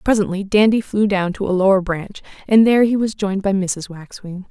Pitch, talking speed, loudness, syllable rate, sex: 200 Hz, 215 wpm, -17 LUFS, 5.5 syllables/s, female